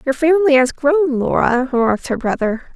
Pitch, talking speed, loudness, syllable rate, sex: 275 Hz, 175 wpm, -16 LUFS, 5.5 syllables/s, female